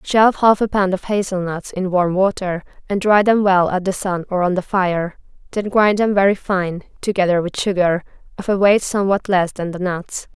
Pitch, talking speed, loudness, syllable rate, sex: 190 Hz, 210 wpm, -18 LUFS, 5.0 syllables/s, female